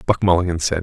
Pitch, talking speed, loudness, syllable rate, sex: 85 Hz, 220 wpm, -18 LUFS, 7.3 syllables/s, male